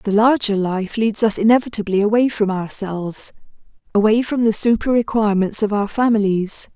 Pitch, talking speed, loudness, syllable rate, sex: 215 Hz, 150 wpm, -18 LUFS, 5.3 syllables/s, female